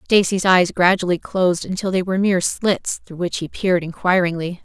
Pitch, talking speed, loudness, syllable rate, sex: 180 Hz, 180 wpm, -19 LUFS, 5.6 syllables/s, female